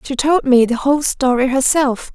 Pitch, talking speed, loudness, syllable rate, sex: 270 Hz, 195 wpm, -15 LUFS, 4.9 syllables/s, female